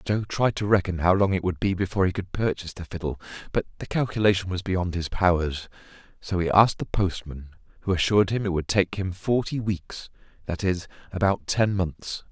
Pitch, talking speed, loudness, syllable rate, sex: 95 Hz, 195 wpm, -25 LUFS, 5.6 syllables/s, male